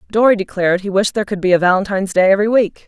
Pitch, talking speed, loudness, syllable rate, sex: 195 Hz, 250 wpm, -15 LUFS, 7.8 syllables/s, female